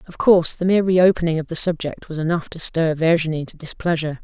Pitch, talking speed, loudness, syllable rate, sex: 165 Hz, 215 wpm, -19 LUFS, 6.4 syllables/s, female